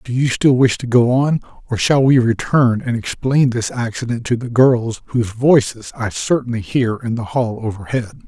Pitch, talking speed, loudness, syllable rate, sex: 120 Hz, 195 wpm, -17 LUFS, 4.9 syllables/s, male